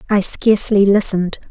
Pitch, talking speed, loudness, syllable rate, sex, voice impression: 200 Hz, 120 wpm, -15 LUFS, 5.7 syllables/s, female, feminine, slightly young, relaxed, slightly dark, soft, muffled, halting, slightly cute, reassuring, elegant, slightly sweet, kind, modest